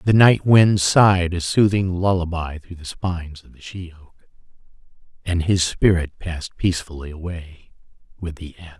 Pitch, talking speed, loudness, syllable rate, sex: 85 Hz, 155 wpm, -19 LUFS, 5.1 syllables/s, male